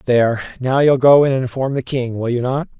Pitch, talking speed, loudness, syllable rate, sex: 130 Hz, 235 wpm, -16 LUFS, 5.5 syllables/s, male